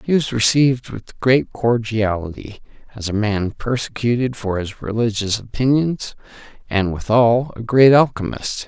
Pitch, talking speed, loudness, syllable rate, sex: 115 Hz, 130 wpm, -18 LUFS, 4.4 syllables/s, male